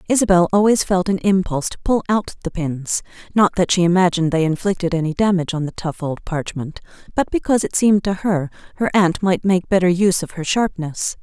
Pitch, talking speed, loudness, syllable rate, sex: 180 Hz, 205 wpm, -18 LUFS, 5.9 syllables/s, female